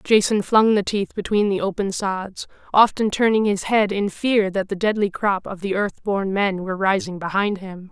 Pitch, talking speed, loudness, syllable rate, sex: 200 Hz, 205 wpm, -20 LUFS, 4.8 syllables/s, female